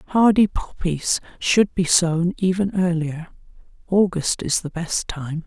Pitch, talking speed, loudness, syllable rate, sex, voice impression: 175 Hz, 130 wpm, -20 LUFS, 3.7 syllables/s, female, feminine, adult-like, calm, slightly sweet